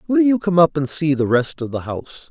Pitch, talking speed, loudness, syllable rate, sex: 155 Hz, 285 wpm, -18 LUFS, 6.2 syllables/s, male